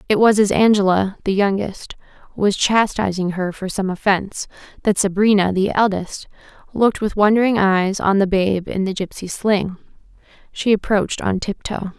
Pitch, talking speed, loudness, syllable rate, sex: 200 Hz, 155 wpm, -18 LUFS, 4.9 syllables/s, female